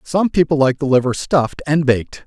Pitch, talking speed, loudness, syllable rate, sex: 145 Hz, 210 wpm, -16 LUFS, 5.7 syllables/s, male